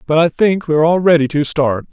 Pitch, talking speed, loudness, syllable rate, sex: 155 Hz, 250 wpm, -14 LUFS, 5.8 syllables/s, male